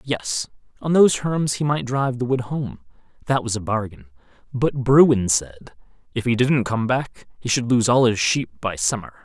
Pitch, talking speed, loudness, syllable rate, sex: 120 Hz, 195 wpm, -20 LUFS, 4.7 syllables/s, male